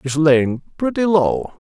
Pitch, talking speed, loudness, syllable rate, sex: 160 Hz, 145 wpm, -17 LUFS, 3.6 syllables/s, male